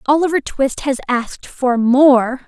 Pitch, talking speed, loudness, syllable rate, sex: 265 Hz, 145 wpm, -15 LUFS, 4.1 syllables/s, female